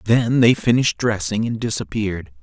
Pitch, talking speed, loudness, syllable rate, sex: 110 Hz, 150 wpm, -19 LUFS, 5.4 syllables/s, male